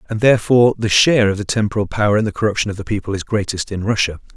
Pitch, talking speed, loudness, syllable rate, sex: 105 Hz, 250 wpm, -17 LUFS, 7.3 syllables/s, male